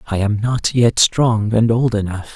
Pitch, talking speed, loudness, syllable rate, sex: 110 Hz, 205 wpm, -16 LUFS, 4.1 syllables/s, male